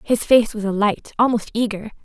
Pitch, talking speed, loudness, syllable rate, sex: 220 Hz, 175 wpm, -19 LUFS, 5.2 syllables/s, female